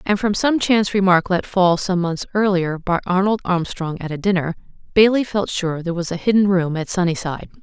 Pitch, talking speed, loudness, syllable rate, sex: 185 Hz, 205 wpm, -19 LUFS, 5.5 syllables/s, female